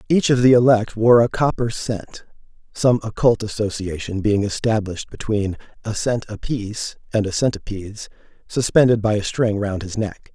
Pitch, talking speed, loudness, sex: 110 Hz, 155 wpm, -20 LUFS, male